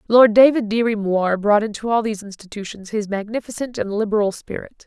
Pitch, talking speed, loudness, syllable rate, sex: 215 Hz, 175 wpm, -19 LUFS, 5.8 syllables/s, female